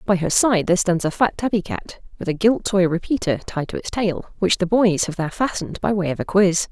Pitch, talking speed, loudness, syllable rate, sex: 185 Hz, 260 wpm, -20 LUFS, 5.7 syllables/s, female